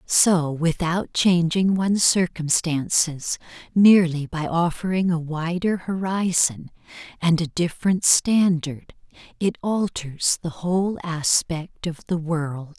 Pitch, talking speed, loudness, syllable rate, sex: 170 Hz, 110 wpm, -21 LUFS, 3.7 syllables/s, female